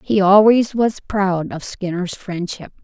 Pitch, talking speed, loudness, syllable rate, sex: 195 Hz, 150 wpm, -17 LUFS, 3.9 syllables/s, female